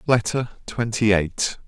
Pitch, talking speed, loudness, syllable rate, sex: 110 Hz, 105 wpm, -22 LUFS, 3.8 syllables/s, male